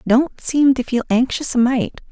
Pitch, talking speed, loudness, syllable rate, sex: 255 Hz, 200 wpm, -17 LUFS, 4.3 syllables/s, female